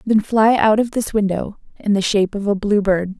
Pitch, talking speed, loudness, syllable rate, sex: 205 Hz, 245 wpm, -17 LUFS, 5.2 syllables/s, female